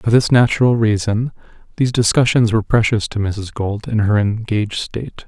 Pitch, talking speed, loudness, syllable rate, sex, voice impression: 110 Hz, 170 wpm, -17 LUFS, 5.5 syllables/s, male, masculine, adult-like, slightly soft, cool, slightly sincere, calm, slightly kind